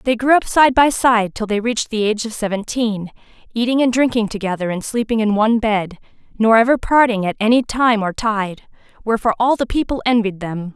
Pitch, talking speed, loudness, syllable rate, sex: 225 Hz, 200 wpm, -17 LUFS, 5.7 syllables/s, female